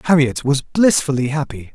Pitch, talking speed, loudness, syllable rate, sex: 140 Hz, 140 wpm, -17 LUFS, 5.1 syllables/s, male